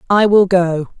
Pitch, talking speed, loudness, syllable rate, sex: 185 Hz, 180 wpm, -13 LUFS, 4.0 syllables/s, female